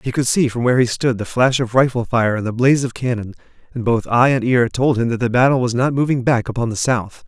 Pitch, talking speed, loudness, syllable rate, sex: 120 Hz, 280 wpm, -17 LUFS, 6.1 syllables/s, male